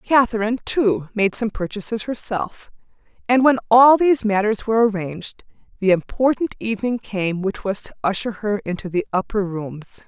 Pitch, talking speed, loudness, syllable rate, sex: 215 Hz, 155 wpm, -20 LUFS, 5.1 syllables/s, female